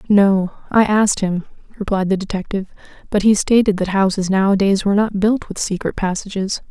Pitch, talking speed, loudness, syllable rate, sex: 200 Hz, 170 wpm, -17 LUFS, 5.7 syllables/s, female